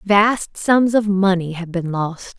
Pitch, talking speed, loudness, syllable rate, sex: 195 Hz, 175 wpm, -18 LUFS, 3.5 syllables/s, female